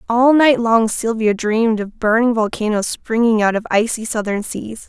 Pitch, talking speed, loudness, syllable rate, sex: 225 Hz, 170 wpm, -17 LUFS, 4.7 syllables/s, female